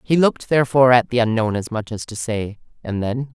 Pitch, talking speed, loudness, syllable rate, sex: 120 Hz, 230 wpm, -19 LUFS, 6.0 syllables/s, female